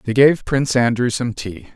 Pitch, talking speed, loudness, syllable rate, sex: 125 Hz, 205 wpm, -17 LUFS, 4.8 syllables/s, male